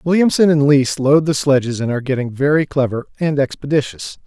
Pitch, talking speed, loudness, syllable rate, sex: 140 Hz, 185 wpm, -16 LUFS, 6.0 syllables/s, male